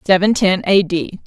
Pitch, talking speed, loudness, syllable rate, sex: 185 Hz, 190 wpm, -15 LUFS, 2.5 syllables/s, female